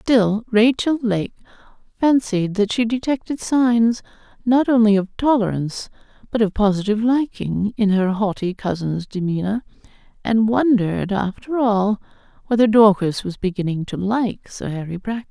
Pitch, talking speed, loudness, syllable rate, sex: 215 Hz, 135 wpm, -19 LUFS, 4.7 syllables/s, female